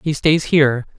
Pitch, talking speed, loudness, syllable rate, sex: 145 Hz, 185 wpm, -16 LUFS, 5.1 syllables/s, male